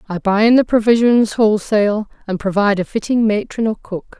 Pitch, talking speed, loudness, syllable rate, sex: 215 Hz, 185 wpm, -16 LUFS, 5.8 syllables/s, female